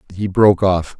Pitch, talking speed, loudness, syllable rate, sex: 95 Hz, 180 wpm, -15 LUFS, 6.4 syllables/s, male